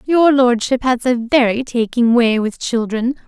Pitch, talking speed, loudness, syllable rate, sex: 245 Hz, 165 wpm, -15 LUFS, 4.2 syllables/s, female